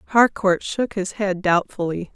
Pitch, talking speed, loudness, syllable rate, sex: 190 Hz, 140 wpm, -21 LUFS, 4.3 syllables/s, female